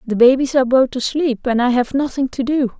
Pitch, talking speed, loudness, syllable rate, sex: 255 Hz, 235 wpm, -17 LUFS, 5.6 syllables/s, female